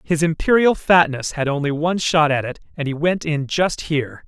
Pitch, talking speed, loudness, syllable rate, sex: 155 Hz, 210 wpm, -19 LUFS, 5.2 syllables/s, male